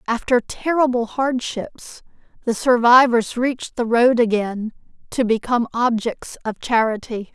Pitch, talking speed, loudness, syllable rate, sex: 235 Hz, 115 wpm, -19 LUFS, 4.3 syllables/s, female